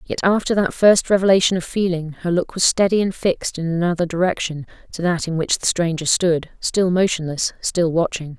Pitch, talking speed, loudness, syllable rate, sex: 175 Hz, 180 wpm, -19 LUFS, 5.4 syllables/s, female